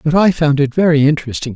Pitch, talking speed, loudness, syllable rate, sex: 150 Hz, 230 wpm, -14 LUFS, 6.7 syllables/s, male